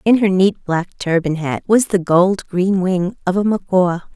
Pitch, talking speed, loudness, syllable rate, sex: 185 Hz, 200 wpm, -17 LUFS, 4.3 syllables/s, female